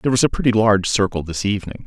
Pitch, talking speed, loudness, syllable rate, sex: 105 Hz, 260 wpm, -18 LUFS, 7.7 syllables/s, male